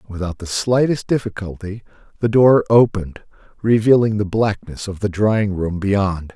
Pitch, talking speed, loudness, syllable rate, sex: 105 Hz, 140 wpm, -18 LUFS, 4.6 syllables/s, male